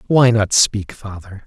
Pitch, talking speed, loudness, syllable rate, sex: 105 Hz, 165 wpm, -15 LUFS, 3.8 syllables/s, male